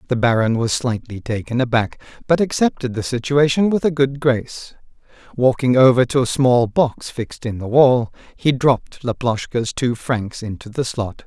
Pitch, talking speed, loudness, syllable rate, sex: 125 Hz, 170 wpm, -18 LUFS, 4.8 syllables/s, male